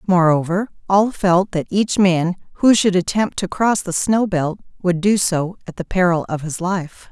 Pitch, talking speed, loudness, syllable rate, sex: 185 Hz, 195 wpm, -18 LUFS, 4.4 syllables/s, female